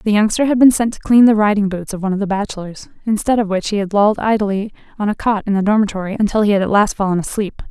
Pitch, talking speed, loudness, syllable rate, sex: 205 Hz, 270 wpm, -16 LUFS, 6.8 syllables/s, female